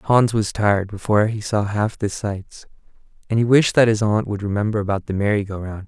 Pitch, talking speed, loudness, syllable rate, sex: 105 Hz, 225 wpm, -20 LUFS, 5.6 syllables/s, male